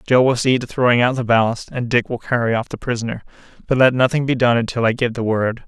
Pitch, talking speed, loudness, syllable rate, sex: 120 Hz, 265 wpm, -18 LUFS, 6.4 syllables/s, male